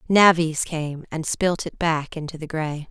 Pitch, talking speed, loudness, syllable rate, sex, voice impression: 160 Hz, 185 wpm, -22 LUFS, 4.1 syllables/s, female, very feminine, slightly young, slightly adult-like, thin, very tensed, powerful, bright, very hard, very clear, fluent, very cool, intellectual, very refreshing, sincere, slightly calm, reassuring, unique, elegant, slightly wild, sweet, very lively, strict, intense, sharp